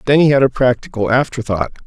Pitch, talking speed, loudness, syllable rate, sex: 125 Hz, 195 wpm, -15 LUFS, 6.4 syllables/s, male